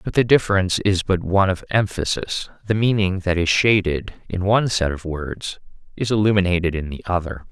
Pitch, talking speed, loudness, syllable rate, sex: 95 Hz, 185 wpm, -20 LUFS, 5.6 syllables/s, male